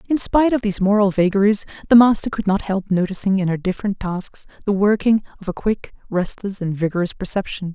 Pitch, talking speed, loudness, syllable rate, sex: 200 Hz, 195 wpm, -19 LUFS, 6.0 syllables/s, female